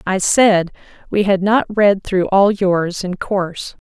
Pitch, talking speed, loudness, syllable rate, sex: 195 Hz, 170 wpm, -16 LUFS, 3.7 syllables/s, female